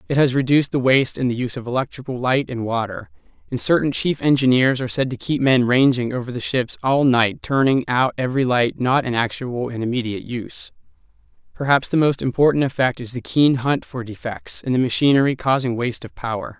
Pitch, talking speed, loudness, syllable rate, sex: 130 Hz, 200 wpm, -20 LUFS, 5.8 syllables/s, male